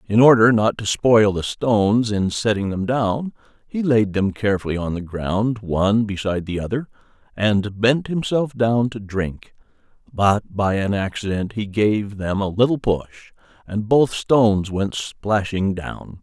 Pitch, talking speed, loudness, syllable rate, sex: 105 Hz, 165 wpm, -20 LUFS, 4.2 syllables/s, male